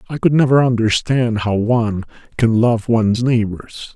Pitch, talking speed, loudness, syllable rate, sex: 115 Hz, 150 wpm, -16 LUFS, 4.7 syllables/s, male